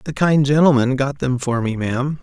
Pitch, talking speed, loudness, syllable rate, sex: 135 Hz, 215 wpm, -18 LUFS, 5.2 syllables/s, male